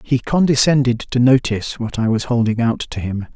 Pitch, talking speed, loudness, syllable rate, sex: 120 Hz, 195 wpm, -17 LUFS, 5.3 syllables/s, male